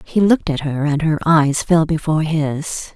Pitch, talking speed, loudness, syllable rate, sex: 155 Hz, 205 wpm, -17 LUFS, 4.7 syllables/s, female